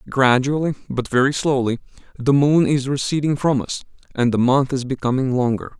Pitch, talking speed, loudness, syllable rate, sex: 135 Hz, 165 wpm, -19 LUFS, 5.3 syllables/s, male